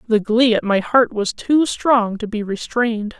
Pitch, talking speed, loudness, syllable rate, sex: 225 Hz, 205 wpm, -18 LUFS, 4.3 syllables/s, female